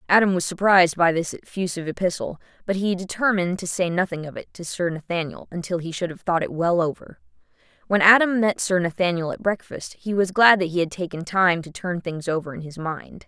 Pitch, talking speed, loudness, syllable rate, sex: 180 Hz, 215 wpm, -22 LUFS, 5.8 syllables/s, female